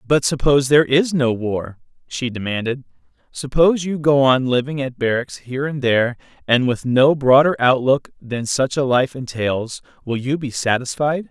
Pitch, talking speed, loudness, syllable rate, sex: 130 Hz, 170 wpm, -18 LUFS, 4.9 syllables/s, male